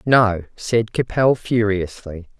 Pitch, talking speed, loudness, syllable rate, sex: 105 Hz, 100 wpm, -19 LUFS, 3.3 syllables/s, female